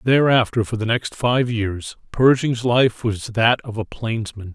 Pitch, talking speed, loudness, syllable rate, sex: 115 Hz, 170 wpm, -19 LUFS, 3.9 syllables/s, male